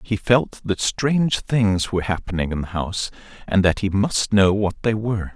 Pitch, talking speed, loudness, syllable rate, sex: 105 Hz, 200 wpm, -21 LUFS, 4.9 syllables/s, male